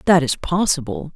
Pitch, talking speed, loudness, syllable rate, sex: 165 Hz, 155 wpm, -19 LUFS, 5.0 syllables/s, female